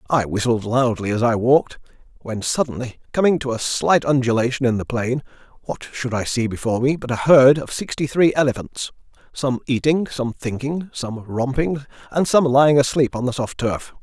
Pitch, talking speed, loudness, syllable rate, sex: 130 Hz, 185 wpm, -20 LUFS, 5.2 syllables/s, male